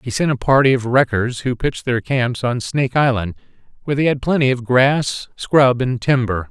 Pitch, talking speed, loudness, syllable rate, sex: 125 Hz, 205 wpm, -17 LUFS, 5.1 syllables/s, male